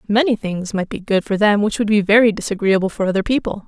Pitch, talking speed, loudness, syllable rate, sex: 205 Hz, 245 wpm, -17 LUFS, 6.3 syllables/s, female